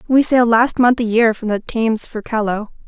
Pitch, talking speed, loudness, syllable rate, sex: 230 Hz, 230 wpm, -16 LUFS, 5.4 syllables/s, female